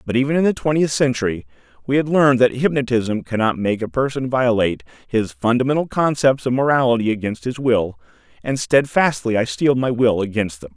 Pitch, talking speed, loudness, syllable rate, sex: 120 Hz, 180 wpm, -18 LUFS, 5.8 syllables/s, male